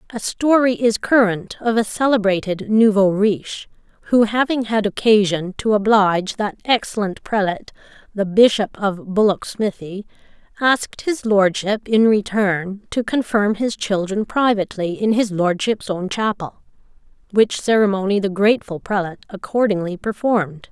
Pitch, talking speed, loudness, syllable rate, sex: 210 Hz, 125 wpm, -18 LUFS, 4.8 syllables/s, female